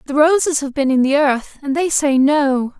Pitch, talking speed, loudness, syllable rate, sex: 285 Hz, 235 wpm, -16 LUFS, 4.6 syllables/s, female